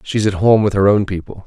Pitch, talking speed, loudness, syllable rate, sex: 100 Hz, 330 wpm, -15 LUFS, 6.6 syllables/s, male